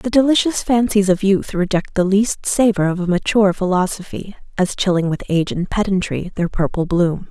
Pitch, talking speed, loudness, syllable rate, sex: 190 Hz, 180 wpm, -17 LUFS, 5.3 syllables/s, female